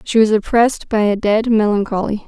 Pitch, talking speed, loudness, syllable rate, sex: 215 Hz, 185 wpm, -16 LUFS, 5.5 syllables/s, female